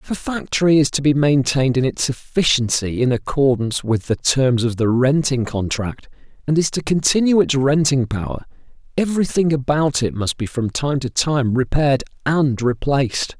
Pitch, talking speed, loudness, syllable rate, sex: 135 Hz, 170 wpm, -18 LUFS, 5.1 syllables/s, male